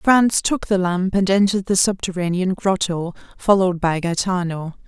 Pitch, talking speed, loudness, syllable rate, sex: 185 Hz, 150 wpm, -19 LUFS, 4.9 syllables/s, female